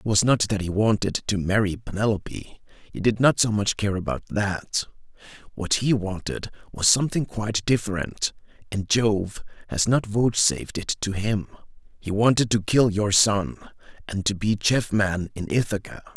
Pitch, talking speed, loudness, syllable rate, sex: 105 Hz, 165 wpm, -23 LUFS, 4.7 syllables/s, male